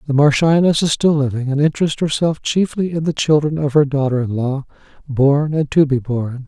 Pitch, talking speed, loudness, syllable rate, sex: 145 Hz, 195 wpm, -17 LUFS, 5.3 syllables/s, male